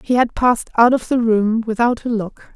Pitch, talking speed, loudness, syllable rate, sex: 230 Hz, 235 wpm, -17 LUFS, 5.1 syllables/s, female